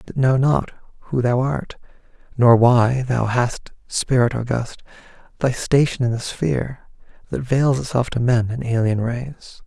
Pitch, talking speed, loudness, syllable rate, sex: 125 Hz, 155 wpm, -19 LUFS, 4.3 syllables/s, male